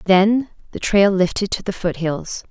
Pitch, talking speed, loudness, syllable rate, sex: 195 Hz, 170 wpm, -19 LUFS, 4.3 syllables/s, female